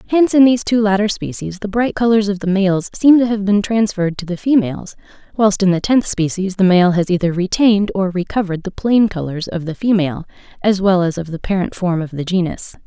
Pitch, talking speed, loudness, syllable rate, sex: 195 Hz, 225 wpm, -16 LUFS, 5.9 syllables/s, female